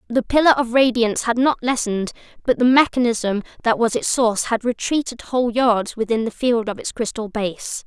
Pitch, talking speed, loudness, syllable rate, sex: 235 Hz, 185 wpm, -19 LUFS, 5.4 syllables/s, female